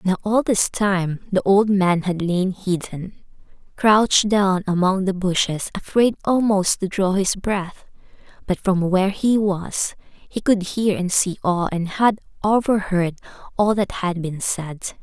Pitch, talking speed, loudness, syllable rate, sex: 190 Hz, 160 wpm, -20 LUFS, 3.9 syllables/s, female